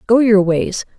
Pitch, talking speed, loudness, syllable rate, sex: 205 Hz, 180 wpm, -14 LUFS, 4.0 syllables/s, female